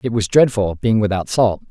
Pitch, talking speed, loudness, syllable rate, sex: 105 Hz, 210 wpm, -17 LUFS, 5.2 syllables/s, male